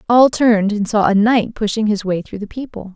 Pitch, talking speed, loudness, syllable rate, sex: 215 Hz, 245 wpm, -16 LUFS, 5.4 syllables/s, female